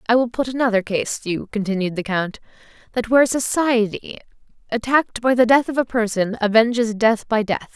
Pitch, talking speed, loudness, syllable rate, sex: 230 Hz, 185 wpm, -19 LUFS, 5.6 syllables/s, female